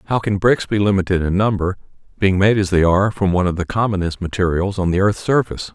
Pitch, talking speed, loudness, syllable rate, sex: 95 Hz, 230 wpm, -18 LUFS, 6.4 syllables/s, male